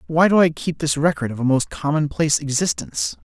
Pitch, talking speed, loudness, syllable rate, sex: 155 Hz, 200 wpm, -20 LUFS, 5.9 syllables/s, male